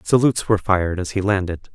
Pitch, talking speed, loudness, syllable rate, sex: 100 Hz, 205 wpm, -20 LUFS, 6.7 syllables/s, male